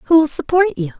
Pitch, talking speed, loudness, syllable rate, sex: 290 Hz, 180 wpm, -16 LUFS, 4.4 syllables/s, female